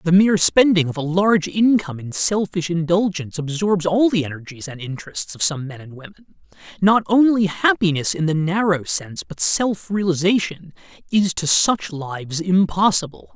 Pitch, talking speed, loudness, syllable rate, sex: 175 Hz, 160 wpm, -19 LUFS, 5.2 syllables/s, male